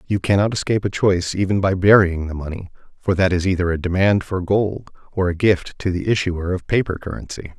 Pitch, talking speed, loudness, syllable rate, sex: 95 Hz, 215 wpm, -19 LUFS, 5.9 syllables/s, male